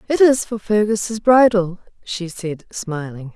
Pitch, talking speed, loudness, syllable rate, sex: 200 Hz, 145 wpm, -18 LUFS, 3.8 syllables/s, female